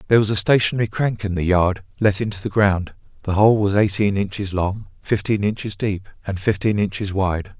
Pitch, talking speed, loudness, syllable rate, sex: 100 Hz, 195 wpm, -20 LUFS, 5.5 syllables/s, male